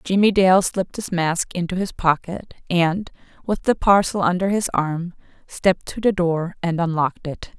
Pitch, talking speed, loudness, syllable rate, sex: 180 Hz, 175 wpm, -20 LUFS, 4.7 syllables/s, female